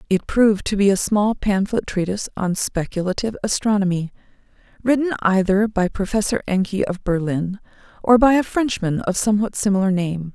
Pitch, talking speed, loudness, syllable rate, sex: 200 Hz, 150 wpm, -20 LUFS, 5.5 syllables/s, female